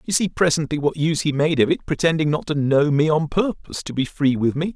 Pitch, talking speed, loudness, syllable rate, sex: 150 Hz, 265 wpm, -20 LUFS, 6.0 syllables/s, male